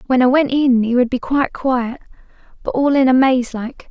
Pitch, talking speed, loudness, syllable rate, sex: 255 Hz, 230 wpm, -16 LUFS, 5.1 syllables/s, female